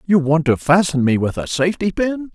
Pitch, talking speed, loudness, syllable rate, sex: 165 Hz, 230 wpm, -17 LUFS, 5.5 syllables/s, male